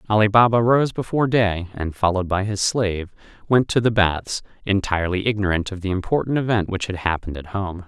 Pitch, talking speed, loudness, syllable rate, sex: 100 Hz, 190 wpm, -21 LUFS, 6.0 syllables/s, male